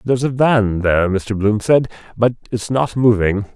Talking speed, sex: 185 wpm, male